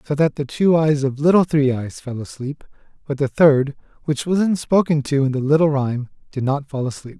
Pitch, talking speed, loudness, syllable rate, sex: 145 Hz, 225 wpm, -19 LUFS, 5.4 syllables/s, male